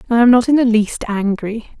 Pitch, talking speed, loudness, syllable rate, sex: 230 Hz, 235 wpm, -15 LUFS, 5.4 syllables/s, female